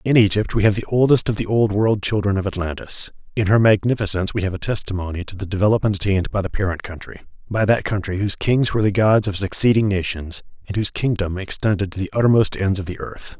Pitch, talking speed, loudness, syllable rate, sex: 100 Hz, 225 wpm, -19 LUFS, 6.5 syllables/s, male